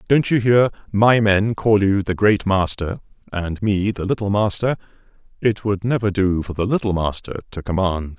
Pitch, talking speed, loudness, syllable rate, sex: 100 Hz, 185 wpm, -19 LUFS, 4.8 syllables/s, male